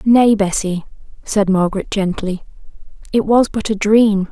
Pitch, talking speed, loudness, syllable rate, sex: 205 Hz, 140 wpm, -16 LUFS, 4.4 syllables/s, female